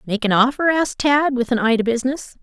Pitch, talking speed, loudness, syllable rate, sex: 250 Hz, 250 wpm, -18 LUFS, 6.4 syllables/s, female